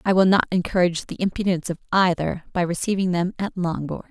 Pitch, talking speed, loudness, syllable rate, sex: 180 Hz, 190 wpm, -22 LUFS, 6.4 syllables/s, female